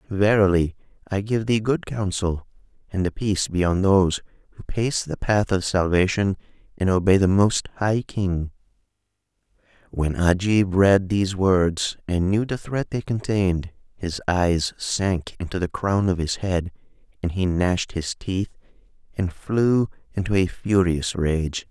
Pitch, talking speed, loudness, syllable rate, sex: 95 Hz, 150 wpm, -22 LUFS, 4.3 syllables/s, male